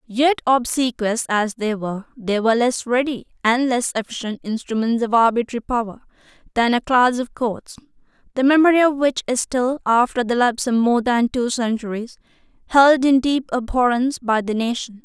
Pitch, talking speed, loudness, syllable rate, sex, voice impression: 240 Hz, 170 wpm, -19 LUFS, 5.2 syllables/s, female, feminine, slightly gender-neutral, slightly young, tensed, powerful, soft, clear, slightly halting, intellectual, slightly friendly, unique, lively, slightly intense